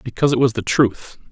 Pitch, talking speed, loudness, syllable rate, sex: 120 Hz, 230 wpm, -18 LUFS, 6.0 syllables/s, male